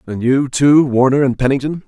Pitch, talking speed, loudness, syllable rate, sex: 135 Hz, 190 wpm, -14 LUFS, 5.2 syllables/s, male